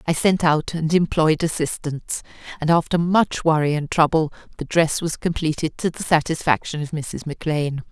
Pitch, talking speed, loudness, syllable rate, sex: 155 Hz, 165 wpm, -21 LUFS, 5.0 syllables/s, female